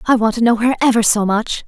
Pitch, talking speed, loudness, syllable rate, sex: 225 Hz, 285 wpm, -15 LUFS, 6.3 syllables/s, female